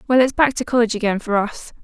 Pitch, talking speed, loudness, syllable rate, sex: 230 Hz, 260 wpm, -18 LUFS, 6.9 syllables/s, female